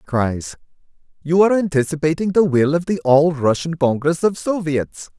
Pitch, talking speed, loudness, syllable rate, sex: 160 Hz, 150 wpm, -18 LUFS, 4.9 syllables/s, male